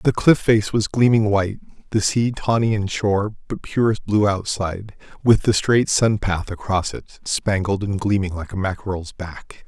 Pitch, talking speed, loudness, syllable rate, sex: 100 Hz, 165 wpm, -20 LUFS, 4.5 syllables/s, male